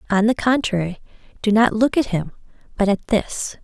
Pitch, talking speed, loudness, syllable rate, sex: 215 Hz, 180 wpm, -20 LUFS, 5.1 syllables/s, female